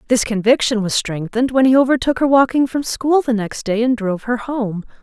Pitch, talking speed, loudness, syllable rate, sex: 240 Hz, 215 wpm, -17 LUFS, 5.6 syllables/s, female